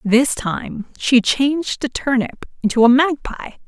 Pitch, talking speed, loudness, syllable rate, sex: 255 Hz, 145 wpm, -17 LUFS, 4.0 syllables/s, female